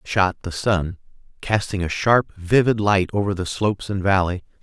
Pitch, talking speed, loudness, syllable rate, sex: 95 Hz, 180 wpm, -21 LUFS, 4.9 syllables/s, male